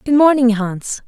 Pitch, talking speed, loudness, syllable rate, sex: 245 Hz, 165 wpm, -14 LUFS, 4.3 syllables/s, female